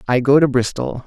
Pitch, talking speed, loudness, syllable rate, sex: 130 Hz, 225 wpm, -16 LUFS, 5.5 syllables/s, male